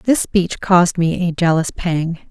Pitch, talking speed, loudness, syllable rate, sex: 175 Hz, 180 wpm, -17 LUFS, 4.2 syllables/s, female